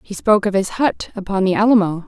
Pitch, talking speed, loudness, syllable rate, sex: 200 Hz, 230 wpm, -17 LUFS, 6.3 syllables/s, female